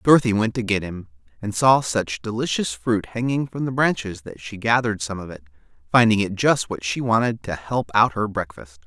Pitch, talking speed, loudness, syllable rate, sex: 105 Hz, 210 wpm, -21 LUFS, 5.4 syllables/s, male